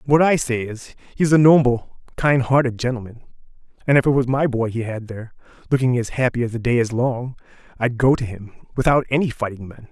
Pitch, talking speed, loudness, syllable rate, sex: 125 Hz, 210 wpm, -19 LUFS, 5.8 syllables/s, male